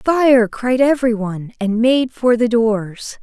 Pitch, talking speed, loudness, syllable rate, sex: 235 Hz, 165 wpm, -16 LUFS, 3.9 syllables/s, female